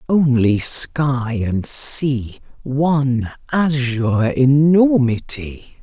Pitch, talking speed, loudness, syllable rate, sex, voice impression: 135 Hz, 60 wpm, -17 LUFS, 3.6 syllables/s, male, very masculine, very adult-like, middle-aged, very thick, slightly tensed, slightly powerful, bright, slightly soft, slightly muffled, slightly halting, cool, very intellectual, very sincere, very calm, very mature, friendly, reassuring, slightly unique, wild, slightly sweet, very lively, slightly strict, slightly sharp